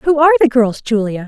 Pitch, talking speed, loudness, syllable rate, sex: 255 Hz, 235 wpm, -13 LUFS, 6.3 syllables/s, female